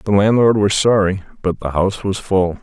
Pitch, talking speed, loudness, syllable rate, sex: 100 Hz, 205 wpm, -16 LUFS, 5.3 syllables/s, male